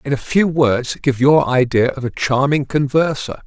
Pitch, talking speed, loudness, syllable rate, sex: 135 Hz, 190 wpm, -16 LUFS, 4.5 syllables/s, male